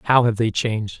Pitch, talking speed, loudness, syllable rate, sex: 110 Hz, 240 wpm, -20 LUFS, 5.3 syllables/s, male